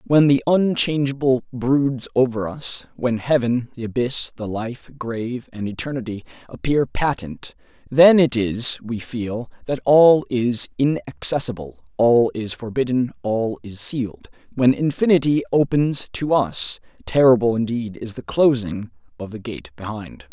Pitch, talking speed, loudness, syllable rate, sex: 125 Hz, 130 wpm, -20 LUFS, 4.2 syllables/s, male